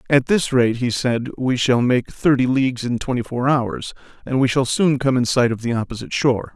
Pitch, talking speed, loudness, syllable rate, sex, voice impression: 125 Hz, 230 wpm, -19 LUFS, 5.4 syllables/s, male, masculine, very adult-like, slightly soft, slightly cool, sincere, calm, kind